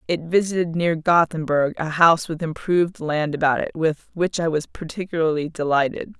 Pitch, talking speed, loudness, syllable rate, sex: 160 Hz, 165 wpm, -21 LUFS, 5.3 syllables/s, female